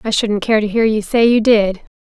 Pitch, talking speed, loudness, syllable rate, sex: 215 Hz, 265 wpm, -15 LUFS, 5.1 syllables/s, female